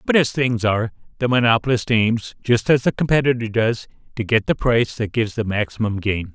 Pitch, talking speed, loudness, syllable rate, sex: 115 Hz, 200 wpm, -19 LUFS, 5.7 syllables/s, male